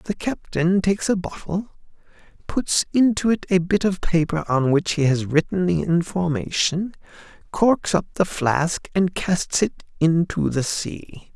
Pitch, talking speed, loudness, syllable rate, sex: 170 Hz, 155 wpm, -21 LUFS, 4.1 syllables/s, male